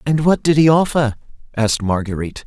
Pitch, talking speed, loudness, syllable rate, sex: 130 Hz, 170 wpm, -16 LUFS, 6.1 syllables/s, male